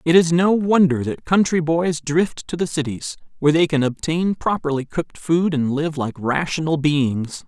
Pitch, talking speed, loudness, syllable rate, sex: 155 Hz, 185 wpm, -20 LUFS, 4.6 syllables/s, male